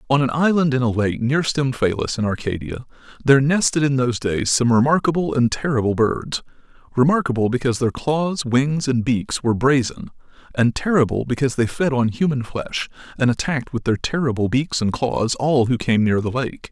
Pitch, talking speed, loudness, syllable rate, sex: 130 Hz, 180 wpm, -20 LUFS, 5.4 syllables/s, male